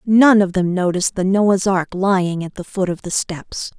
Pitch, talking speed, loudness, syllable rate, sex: 190 Hz, 220 wpm, -17 LUFS, 4.7 syllables/s, female